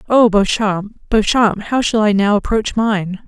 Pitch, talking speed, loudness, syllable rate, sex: 210 Hz, 165 wpm, -15 LUFS, 4.0 syllables/s, female